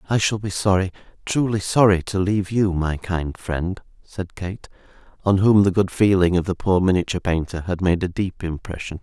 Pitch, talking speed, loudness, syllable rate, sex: 95 Hz, 185 wpm, -21 LUFS, 5.2 syllables/s, male